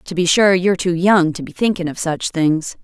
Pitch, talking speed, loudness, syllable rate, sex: 175 Hz, 255 wpm, -16 LUFS, 5.2 syllables/s, female